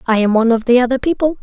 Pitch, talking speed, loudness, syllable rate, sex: 245 Hz, 295 wpm, -14 LUFS, 8.1 syllables/s, female